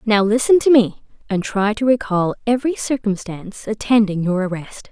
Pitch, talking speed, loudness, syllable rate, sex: 215 Hz, 160 wpm, -18 LUFS, 5.2 syllables/s, female